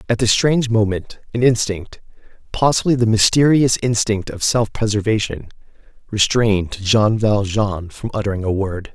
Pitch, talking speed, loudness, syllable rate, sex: 110 Hz, 120 wpm, -17 LUFS, 4.8 syllables/s, male